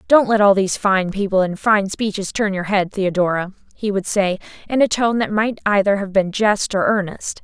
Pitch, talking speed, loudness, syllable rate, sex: 200 Hz, 220 wpm, -18 LUFS, 5.1 syllables/s, female